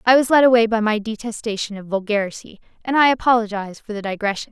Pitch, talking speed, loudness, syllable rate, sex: 220 Hz, 200 wpm, -19 LUFS, 6.7 syllables/s, female